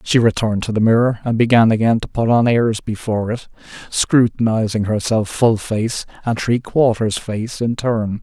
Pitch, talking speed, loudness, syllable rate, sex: 115 Hz, 175 wpm, -17 LUFS, 4.8 syllables/s, male